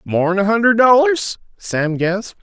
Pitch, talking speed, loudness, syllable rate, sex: 200 Hz, 150 wpm, -15 LUFS, 4.7 syllables/s, male